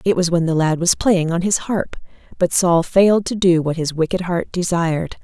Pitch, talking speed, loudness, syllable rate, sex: 175 Hz, 230 wpm, -18 LUFS, 5.1 syllables/s, female